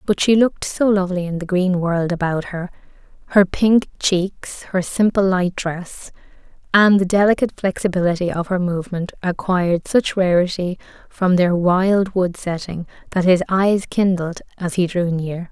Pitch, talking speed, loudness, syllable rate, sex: 185 Hz, 160 wpm, -18 LUFS, 4.7 syllables/s, female